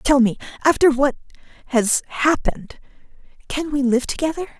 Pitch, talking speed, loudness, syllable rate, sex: 270 Hz, 130 wpm, -19 LUFS, 5.3 syllables/s, female